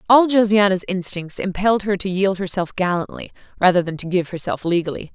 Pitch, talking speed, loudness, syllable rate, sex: 190 Hz, 175 wpm, -19 LUFS, 5.8 syllables/s, female